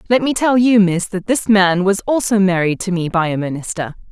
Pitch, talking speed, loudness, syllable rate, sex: 195 Hz, 235 wpm, -16 LUFS, 5.3 syllables/s, female